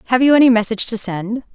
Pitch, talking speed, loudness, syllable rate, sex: 230 Hz, 235 wpm, -15 LUFS, 7.3 syllables/s, female